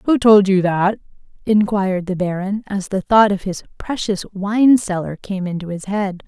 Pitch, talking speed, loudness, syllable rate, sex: 195 Hz, 180 wpm, -18 LUFS, 4.6 syllables/s, female